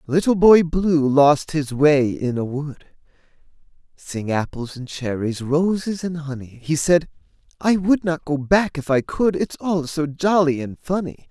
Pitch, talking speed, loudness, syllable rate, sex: 155 Hz, 170 wpm, -20 LUFS, 4.0 syllables/s, male